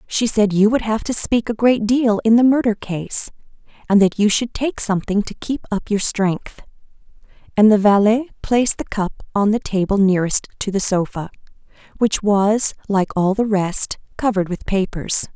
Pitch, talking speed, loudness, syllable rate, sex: 210 Hz, 185 wpm, -18 LUFS, 4.8 syllables/s, female